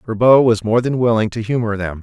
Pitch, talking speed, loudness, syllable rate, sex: 115 Hz, 235 wpm, -15 LUFS, 5.8 syllables/s, male